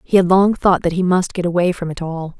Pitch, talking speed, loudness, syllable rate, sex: 175 Hz, 300 wpm, -17 LUFS, 5.8 syllables/s, female